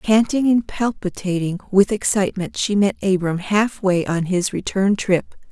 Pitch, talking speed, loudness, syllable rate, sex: 195 Hz, 140 wpm, -19 LUFS, 4.4 syllables/s, female